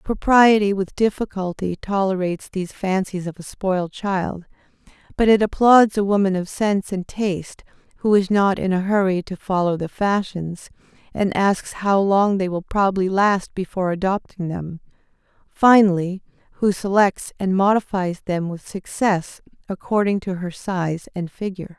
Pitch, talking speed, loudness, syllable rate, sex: 190 Hz, 150 wpm, -20 LUFS, 4.7 syllables/s, female